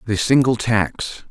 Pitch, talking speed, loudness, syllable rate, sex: 110 Hz, 140 wpm, -18 LUFS, 4.0 syllables/s, male